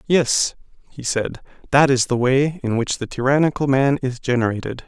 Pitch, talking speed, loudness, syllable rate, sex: 130 Hz, 170 wpm, -19 LUFS, 5.0 syllables/s, male